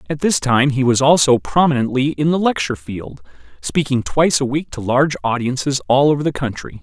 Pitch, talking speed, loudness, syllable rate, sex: 135 Hz, 195 wpm, -17 LUFS, 5.7 syllables/s, male